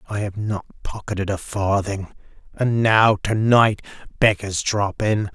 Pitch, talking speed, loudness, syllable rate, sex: 105 Hz, 145 wpm, -20 LUFS, 4.1 syllables/s, male